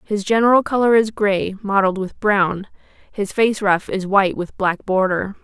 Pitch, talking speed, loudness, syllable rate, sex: 200 Hz, 175 wpm, -18 LUFS, 4.6 syllables/s, female